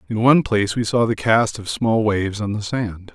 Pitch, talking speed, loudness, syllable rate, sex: 110 Hz, 250 wpm, -19 LUFS, 5.4 syllables/s, male